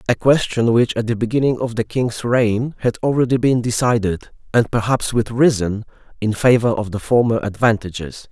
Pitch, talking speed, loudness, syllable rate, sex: 115 Hz, 175 wpm, -18 LUFS, 5.2 syllables/s, male